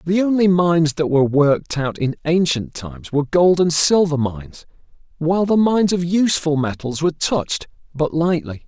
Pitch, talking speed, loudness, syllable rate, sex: 160 Hz, 175 wpm, -18 LUFS, 5.4 syllables/s, male